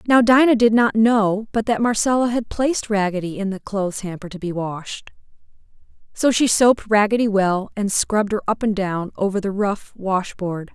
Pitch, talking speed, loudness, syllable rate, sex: 210 Hz, 190 wpm, -19 LUFS, 5.0 syllables/s, female